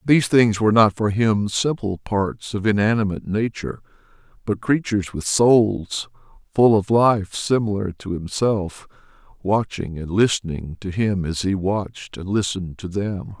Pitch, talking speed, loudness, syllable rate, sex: 100 Hz, 150 wpm, -21 LUFS, 4.6 syllables/s, male